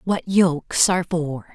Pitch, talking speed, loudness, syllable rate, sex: 170 Hz, 155 wpm, -20 LUFS, 4.1 syllables/s, female